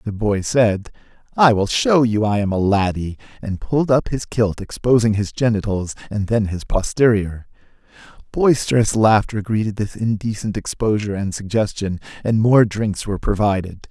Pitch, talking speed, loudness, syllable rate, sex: 110 Hz, 155 wpm, -19 LUFS, 4.9 syllables/s, male